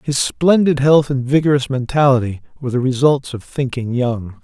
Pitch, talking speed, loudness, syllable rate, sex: 135 Hz, 160 wpm, -16 LUFS, 5.1 syllables/s, male